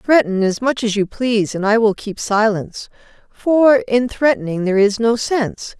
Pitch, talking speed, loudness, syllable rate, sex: 225 Hz, 185 wpm, -16 LUFS, 4.9 syllables/s, female